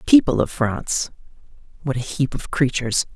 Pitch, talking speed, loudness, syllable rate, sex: 140 Hz, 150 wpm, -21 LUFS, 5.4 syllables/s, female